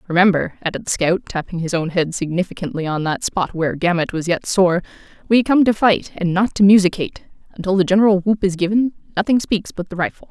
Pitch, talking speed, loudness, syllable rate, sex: 185 Hz, 210 wpm, -18 LUFS, 6.1 syllables/s, female